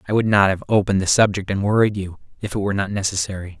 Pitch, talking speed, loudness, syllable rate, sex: 100 Hz, 250 wpm, -19 LUFS, 7.2 syllables/s, male